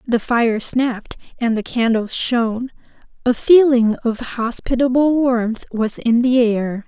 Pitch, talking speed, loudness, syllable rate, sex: 240 Hz, 140 wpm, -17 LUFS, 3.9 syllables/s, female